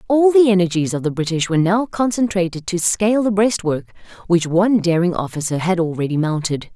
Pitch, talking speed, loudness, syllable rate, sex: 185 Hz, 180 wpm, -18 LUFS, 5.8 syllables/s, female